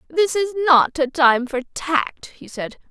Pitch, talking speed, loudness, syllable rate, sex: 300 Hz, 185 wpm, -18 LUFS, 4.0 syllables/s, female